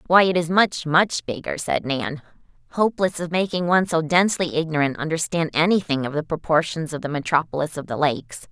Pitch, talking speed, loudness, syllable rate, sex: 160 Hz, 185 wpm, -21 LUFS, 5.8 syllables/s, female